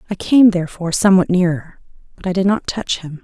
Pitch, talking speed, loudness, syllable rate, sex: 180 Hz, 185 wpm, -16 LUFS, 6.3 syllables/s, female